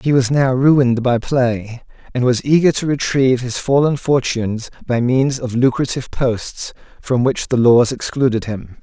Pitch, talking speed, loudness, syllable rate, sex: 125 Hz, 170 wpm, -16 LUFS, 4.6 syllables/s, male